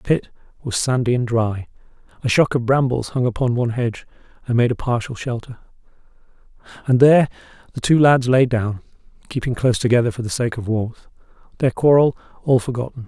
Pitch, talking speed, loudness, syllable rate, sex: 120 Hz, 175 wpm, -19 LUFS, 6.1 syllables/s, male